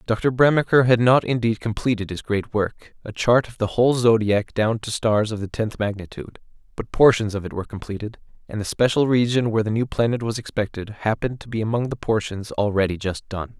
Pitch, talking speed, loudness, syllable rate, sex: 110 Hz, 200 wpm, -21 LUFS, 5.8 syllables/s, male